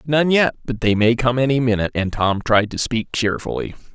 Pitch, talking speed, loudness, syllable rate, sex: 120 Hz, 215 wpm, -19 LUFS, 5.5 syllables/s, male